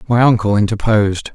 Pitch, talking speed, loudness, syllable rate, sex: 110 Hz, 135 wpm, -14 LUFS, 5.9 syllables/s, male